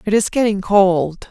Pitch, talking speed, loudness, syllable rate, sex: 195 Hz, 185 wpm, -16 LUFS, 4.1 syllables/s, female